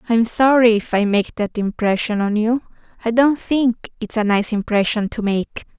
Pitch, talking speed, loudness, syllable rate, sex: 225 Hz, 185 wpm, -18 LUFS, 4.8 syllables/s, female